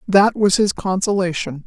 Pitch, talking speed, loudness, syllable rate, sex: 190 Hz, 145 wpm, -18 LUFS, 4.6 syllables/s, female